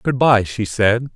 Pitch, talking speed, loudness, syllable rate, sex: 115 Hz, 210 wpm, -17 LUFS, 3.6 syllables/s, male